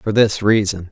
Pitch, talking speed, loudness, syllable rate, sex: 105 Hz, 195 wpm, -16 LUFS, 4.6 syllables/s, male